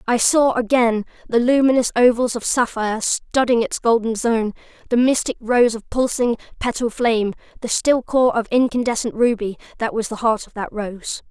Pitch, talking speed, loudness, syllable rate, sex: 235 Hz, 170 wpm, -19 LUFS, 5.0 syllables/s, female